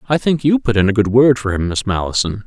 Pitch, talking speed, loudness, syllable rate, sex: 115 Hz, 290 wpm, -15 LUFS, 6.1 syllables/s, male